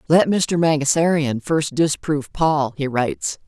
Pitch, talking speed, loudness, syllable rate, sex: 150 Hz, 140 wpm, -19 LUFS, 4.4 syllables/s, female